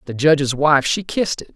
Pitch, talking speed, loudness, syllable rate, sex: 150 Hz, 230 wpm, -17 LUFS, 5.8 syllables/s, male